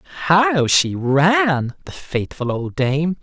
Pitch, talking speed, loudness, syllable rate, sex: 155 Hz, 130 wpm, -18 LUFS, 3.2 syllables/s, male